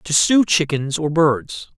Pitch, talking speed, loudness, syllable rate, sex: 155 Hz, 170 wpm, -17 LUFS, 3.5 syllables/s, male